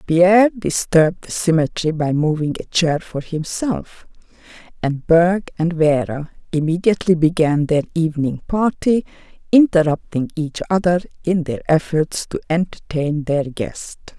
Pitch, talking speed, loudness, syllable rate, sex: 165 Hz, 125 wpm, -18 LUFS, 4.5 syllables/s, female